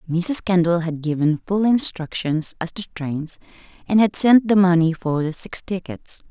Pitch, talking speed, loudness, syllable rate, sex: 175 Hz, 170 wpm, -20 LUFS, 4.5 syllables/s, female